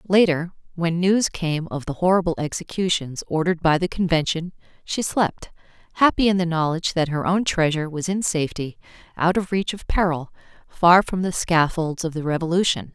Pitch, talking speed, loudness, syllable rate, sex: 170 Hz, 170 wpm, -21 LUFS, 5.3 syllables/s, female